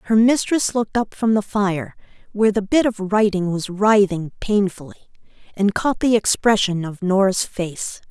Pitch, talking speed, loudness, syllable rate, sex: 205 Hz, 165 wpm, -19 LUFS, 4.7 syllables/s, female